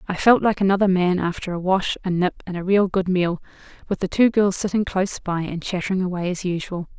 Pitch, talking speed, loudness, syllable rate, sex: 185 Hz, 230 wpm, -21 LUFS, 5.8 syllables/s, female